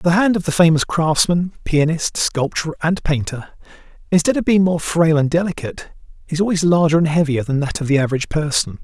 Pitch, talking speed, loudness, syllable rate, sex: 160 Hz, 190 wpm, -17 LUFS, 5.7 syllables/s, male